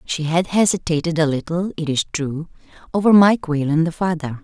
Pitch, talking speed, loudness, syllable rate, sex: 165 Hz, 175 wpm, -19 LUFS, 5.3 syllables/s, female